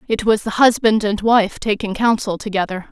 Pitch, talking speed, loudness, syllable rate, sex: 210 Hz, 185 wpm, -17 LUFS, 5.1 syllables/s, female